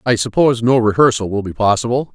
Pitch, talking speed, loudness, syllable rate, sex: 115 Hz, 195 wpm, -15 LUFS, 6.4 syllables/s, male